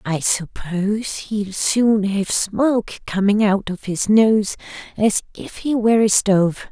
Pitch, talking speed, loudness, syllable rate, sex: 205 Hz, 150 wpm, -18 LUFS, 3.8 syllables/s, female